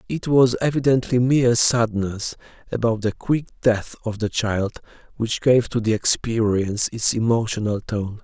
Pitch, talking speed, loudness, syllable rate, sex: 115 Hz, 145 wpm, -21 LUFS, 4.5 syllables/s, male